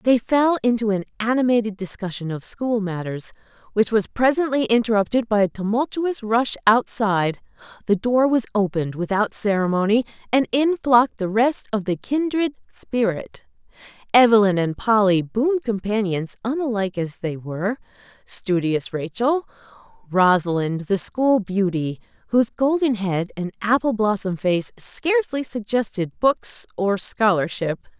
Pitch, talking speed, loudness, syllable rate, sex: 215 Hz, 125 wpm, -21 LUFS, 4.6 syllables/s, female